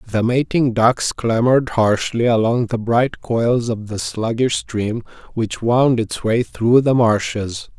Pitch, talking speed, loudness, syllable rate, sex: 115 Hz, 155 wpm, -18 LUFS, 3.8 syllables/s, male